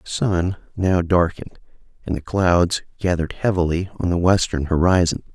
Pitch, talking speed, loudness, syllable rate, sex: 90 Hz, 145 wpm, -20 LUFS, 5.0 syllables/s, male